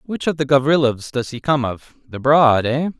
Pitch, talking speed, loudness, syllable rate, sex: 135 Hz, 220 wpm, -18 LUFS, 4.8 syllables/s, male